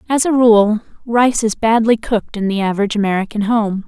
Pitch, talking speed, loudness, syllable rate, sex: 220 Hz, 185 wpm, -15 LUFS, 5.8 syllables/s, female